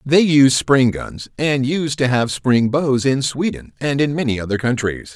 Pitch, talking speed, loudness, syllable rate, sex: 135 Hz, 200 wpm, -17 LUFS, 4.5 syllables/s, male